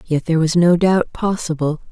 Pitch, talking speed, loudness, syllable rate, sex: 165 Hz, 190 wpm, -17 LUFS, 5.2 syllables/s, female